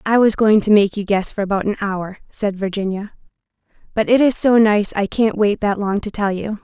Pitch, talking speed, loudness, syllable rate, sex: 205 Hz, 235 wpm, -17 LUFS, 5.2 syllables/s, female